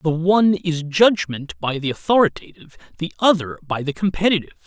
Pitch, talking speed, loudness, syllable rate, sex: 170 Hz, 165 wpm, -19 LUFS, 6.1 syllables/s, male